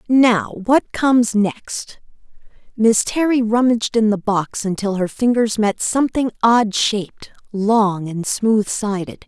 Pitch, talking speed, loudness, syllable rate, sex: 220 Hz, 135 wpm, -18 LUFS, 3.9 syllables/s, female